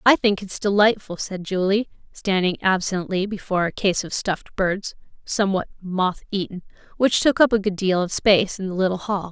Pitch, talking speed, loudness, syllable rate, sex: 195 Hz, 185 wpm, -22 LUFS, 5.3 syllables/s, female